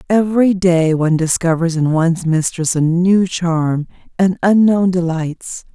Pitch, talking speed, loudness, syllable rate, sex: 175 Hz, 135 wpm, -15 LUFS, 4.3 syllables/s, female